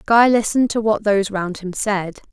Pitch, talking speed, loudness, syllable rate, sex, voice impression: 210 Hz, 205 wpm, -18 LUFS, 5.3 syllables/s, female, feminine, adult-like, slightly powerful, intellectual, slightly sharp